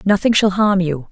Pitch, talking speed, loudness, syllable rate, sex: 190 Hz, 215 wpm, -15 LUFS, 5.0 syllables/s, female